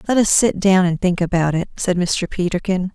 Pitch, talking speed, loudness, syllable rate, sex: 185 Hz, 225 wpm, -18 LUFS, 5.2 syllables/s, female